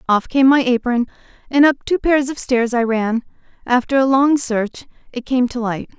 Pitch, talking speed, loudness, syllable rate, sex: 250 Hz, 200 wpm, -17 LUFS, 4.9 syllables/s, female